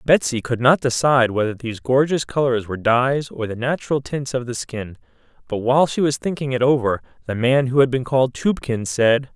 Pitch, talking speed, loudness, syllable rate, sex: 125 Hz, 205 wpm, -20 LUFS, 5.7 syllables/s, male